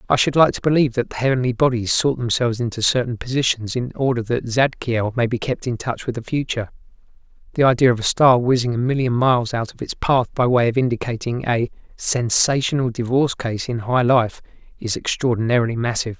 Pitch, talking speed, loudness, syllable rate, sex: 120 Hz, 195 wpm, -19 LUFS, 6.0 syllables/s, male